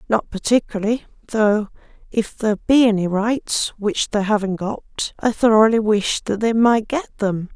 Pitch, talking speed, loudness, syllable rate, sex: 215 Hz, 150 wpm, -19 LUFS, 4.6 syllables/s, female